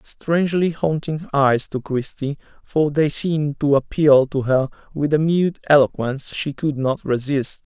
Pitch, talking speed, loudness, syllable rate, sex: 145 Hz, 155 wpm, -20 LUFS, 4.3 syllables/s, male